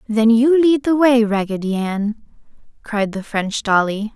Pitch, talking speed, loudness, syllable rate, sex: 225 Hz, 160 wpm, -17 LUFS, 4.1 syllables/s, female